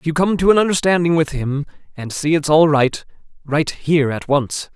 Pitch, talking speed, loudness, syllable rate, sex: 155 Hz, 215 wpm, -17 LUFS, 5.5 syllables/s, male